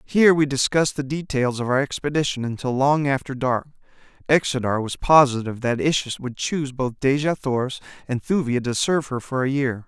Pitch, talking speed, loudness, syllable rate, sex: 135 Hz, 180 wpm, -22 LUFS, 5.7 syllables/s, male